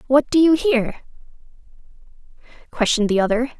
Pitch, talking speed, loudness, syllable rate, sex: 255 Hz, 115 wpm, -18 LUFS, 6.8 syllables/s, female